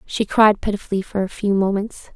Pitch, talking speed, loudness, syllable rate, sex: 200 Hz, 195 wpm, -19 LUFS, 5.5 syllables/s, female